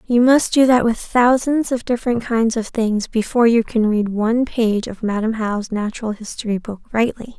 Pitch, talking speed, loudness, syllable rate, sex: 230 Hz, 195 wpm, -18 LUFS, 5.1 syllables/s, female